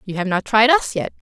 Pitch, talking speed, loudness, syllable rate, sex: 225 Hz, 275 wpm, -17 LUFS, 5.7 syllables/s, female